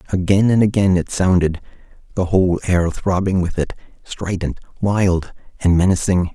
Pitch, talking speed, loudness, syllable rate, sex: 90 Hz, 140 wpm, -18 LUFS, 5.0 syllables/s, male